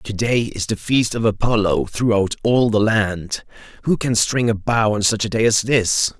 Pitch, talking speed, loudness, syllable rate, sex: 110 Hz, 205 wpm, -18 LUFS, 4.4 syllables/s, male